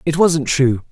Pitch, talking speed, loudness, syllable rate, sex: 145 Hz, 195 wpm, -16 LUFS, 4.0 syllables/s, male